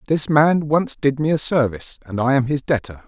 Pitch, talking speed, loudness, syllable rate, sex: 140 Hz, 235 wpm, -19 LUFS, 5.4 syllables/s, male